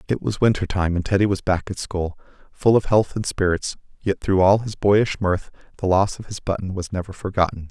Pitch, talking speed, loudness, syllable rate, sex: 95 Hz, 225 wpm, -21 LUFS, 5.4 syllables/s, male